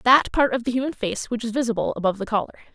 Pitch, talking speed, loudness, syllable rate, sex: 235 Hz, 260 wpm, -23 LUFS, 7.3 syllables/s, female